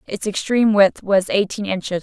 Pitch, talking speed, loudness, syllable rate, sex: 200 Hz, 180 wpm, -18 LUFS, 5.2 syllables/s, female